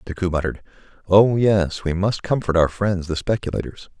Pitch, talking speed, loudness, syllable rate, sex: 90 Hz, 165 wpm, -20 LUFS, 5.3 syllables/s, male